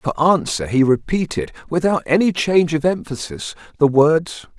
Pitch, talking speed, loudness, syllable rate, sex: 155 Hz, 145 wpm, -18 LUFS, 4.9 syllables/s, male